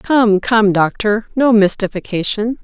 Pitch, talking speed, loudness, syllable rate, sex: 215 Hz, 115 wpm, -14 LUFS, 4.0 syllables/s, female